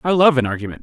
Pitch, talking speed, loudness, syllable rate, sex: 135 Hz, 290 wpm, -16 LUFS, 7.7 syllables/s, male